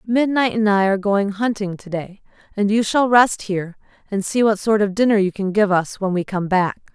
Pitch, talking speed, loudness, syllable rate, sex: 205 Hz, 235 wpm, -19 LUFS, 5.3 syllables/s, female